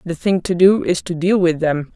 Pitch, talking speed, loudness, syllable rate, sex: 175 Hz, 275 wpm, -17 LUFS, 4.9 syllables/s, female